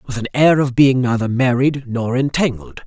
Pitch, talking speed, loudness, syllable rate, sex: 130 Hz, 190 wpm, -16 LUFS, 4.7 syllables/s, male